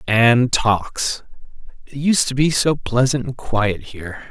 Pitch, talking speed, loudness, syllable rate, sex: 125 Hz, 155 wpm, -18 LUFS, 3.7 syllables/s, male